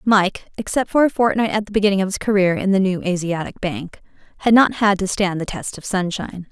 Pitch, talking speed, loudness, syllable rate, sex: 195 Hz, 230 wpm, -19 LUFS, 5.8 syllables/s, female